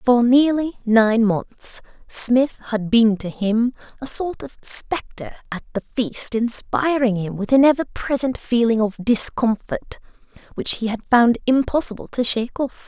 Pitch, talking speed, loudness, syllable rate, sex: 235 Hz, 160 wpm, -19 LUFS, 4.4 syllables/s, female